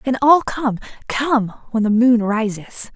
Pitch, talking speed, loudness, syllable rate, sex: 235 Hz, 140 wpm, -18 LUFS, 3.7 syllables/s, female